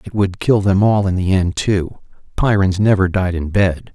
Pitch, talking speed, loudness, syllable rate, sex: 95 Hz, 215 wpm, -16 LUFS, 4.6 syllables/s, male